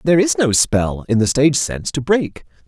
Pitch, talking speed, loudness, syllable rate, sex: 135 Hz, 225 wpm, -16 LUFS, 5.6 syllables/s, male